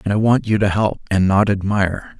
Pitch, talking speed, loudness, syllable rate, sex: 100 Hz, 245 wpm, -17 LUFS, 5.6 syllables/s, male